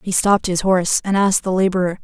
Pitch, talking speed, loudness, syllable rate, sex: 185 Hz, 235 wpm, -17 LUFS, 6.8 syllables/s, female